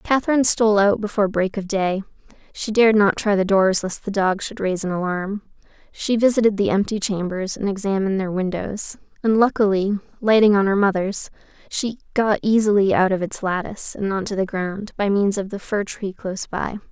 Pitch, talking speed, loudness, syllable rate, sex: 200 Hz, 195 wpm, -20 LUFS, 5.6 syllables/s, female